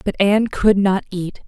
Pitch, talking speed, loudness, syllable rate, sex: 200 Hz, 205 wpm, -17 LUFS, 4.6 syllables/s, female